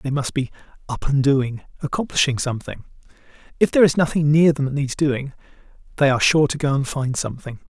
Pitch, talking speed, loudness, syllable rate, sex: 140 Hz, 195 wpm, -20 LUFS, 6.2 syllables/s, male